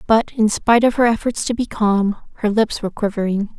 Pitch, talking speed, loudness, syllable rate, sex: 215 Hz, 220 wpm, -18 LUFS, 5.7 syllables/s, female